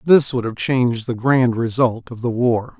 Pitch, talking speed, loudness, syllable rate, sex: 120 Hz, 215 wpm, -18 LUFS, 4.5 syllables/s, male